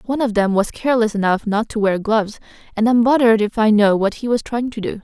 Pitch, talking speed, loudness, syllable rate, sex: 220 Hz, 260 wpm, -17 LUFS, 6.4 syllables/s, female